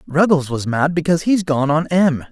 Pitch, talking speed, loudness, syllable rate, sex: 155 Hz, 210 wpm, -17 LUFS, 5.2 syllables/s, male